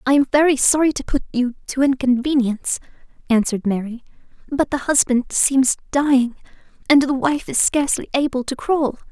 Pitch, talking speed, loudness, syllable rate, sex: 265 Hz, 160 wpm, -18 LUFS, 5.4 syllables/s, female